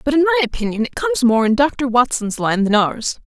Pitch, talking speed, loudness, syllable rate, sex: 255 Hz, 240 wpm, -17 LUFS, 5.7 syllables/s, female